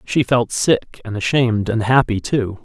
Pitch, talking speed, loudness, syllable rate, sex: 115 Hz, 180 wpm, -18 LUFS, 4.4 syllables/s, male